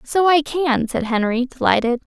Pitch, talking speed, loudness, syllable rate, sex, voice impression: 270 Hz, 170 wpm, -18 LUFS, 4.6 syllables/s, female, slightly feminine, slightly young, slightly bright, clear, slightly cute, refreshing, slightly lively